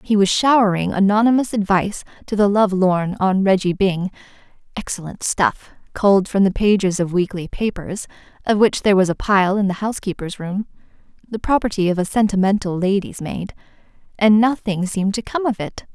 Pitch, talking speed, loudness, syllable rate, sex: 200 Hz, 160 wpm, -18 LUFS, 5.5 syllables/s, female